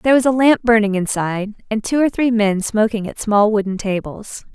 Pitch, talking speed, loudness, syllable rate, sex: 215 Hz, 210 wpm, -17 LUFS, 5.4 syllables/s, female